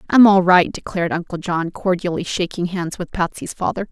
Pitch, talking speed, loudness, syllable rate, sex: 180 Hz, 185 wpm, -19 LUFS, 5.4 syllables/s, female